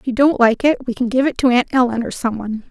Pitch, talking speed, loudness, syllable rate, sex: 245 Hz, 330 wpm, -17 LUFS, 6.8 syllables/s, female